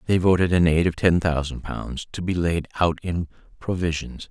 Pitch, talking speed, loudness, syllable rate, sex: 85 Hz, 195 wpm, -23 LUFS, 4.9 syllables/s, male